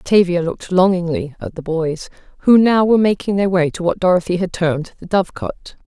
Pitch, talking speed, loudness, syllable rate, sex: 180 Hz, 205 wpm, -17 LUFS, 5.7 syllables/s, female